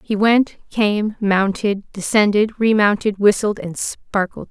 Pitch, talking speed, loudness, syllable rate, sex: 205 Hz, 135 wpm, -18 LUFS, 3.7 syllables/s, female